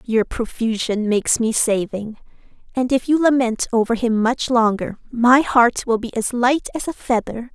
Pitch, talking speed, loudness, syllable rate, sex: 235 Hz, 175 wpm, -19 LUFS, 4.6 syllables/s, female